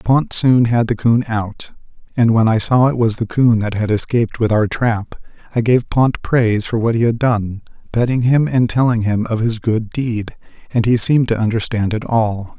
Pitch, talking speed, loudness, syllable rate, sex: 115 Hz, 215 wpm, -16 LUFS, 4.8 syllables/s, male